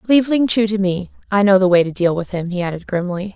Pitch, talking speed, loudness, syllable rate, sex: 195 Hz, 285 wpm, -17 LUFS, 6.4 syllables/s, female